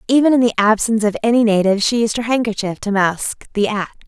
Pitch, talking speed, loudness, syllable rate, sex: 220 Hz, 220 wpm, -16 LUFS, 6.2 syllables/s, female